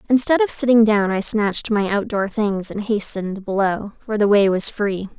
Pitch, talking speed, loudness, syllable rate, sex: 210 Hz, 195 wpm, -19 LUFS, 4.9 syllables/s, female